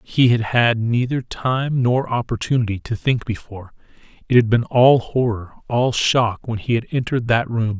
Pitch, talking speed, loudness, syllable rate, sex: 120 Hz, 175 wpm, -19 LUFS, 4.7 syllables/s, male